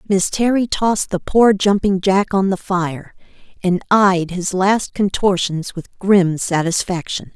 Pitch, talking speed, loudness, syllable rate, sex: 190 Hz, 145 wpm, -17 LUFS, 3.9 syllables/s, female